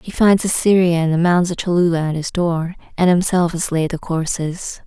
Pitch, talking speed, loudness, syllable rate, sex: 175 Hz, 210 wpm, -17 LUFS, 5.0 syllables/s, female